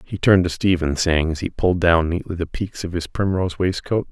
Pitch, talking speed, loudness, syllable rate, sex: 85 Hz, 235 wpm, -20 LUFS, 5.8 syllables/s, male